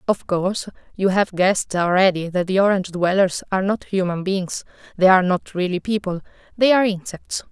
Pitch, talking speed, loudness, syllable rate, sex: 190 Hz, 175 wpm, -20 LUFS, 5.7 syllables/s, female